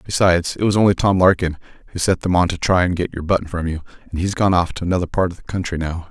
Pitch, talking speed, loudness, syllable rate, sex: 90 Hz, 285 wpm, -19 LUFS, 6.9 syllables/s, male